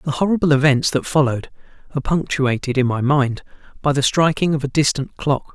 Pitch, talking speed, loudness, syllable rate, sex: 140 Hz, 185 wpm, -18 LUFS, 5.9 syllables/s, male